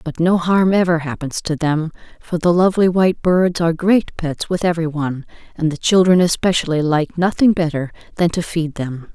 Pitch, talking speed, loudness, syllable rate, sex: 170 Hz, 190 wpm, -17 LUFS, 5.4 syllables/s, female